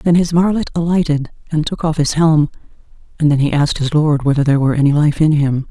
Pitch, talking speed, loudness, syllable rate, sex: 150 Hz, 230 wpm, -15 LUFS, 6.3 syllables/s, female